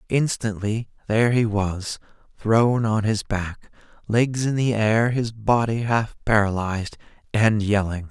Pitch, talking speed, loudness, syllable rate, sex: 110 Hz, 135 wpm, -22 LUFS, 4.0 syllables/s, male